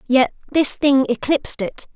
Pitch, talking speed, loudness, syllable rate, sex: 265 Hz, 155 wpm, -18 LUFS, 4.7 syllables/s, female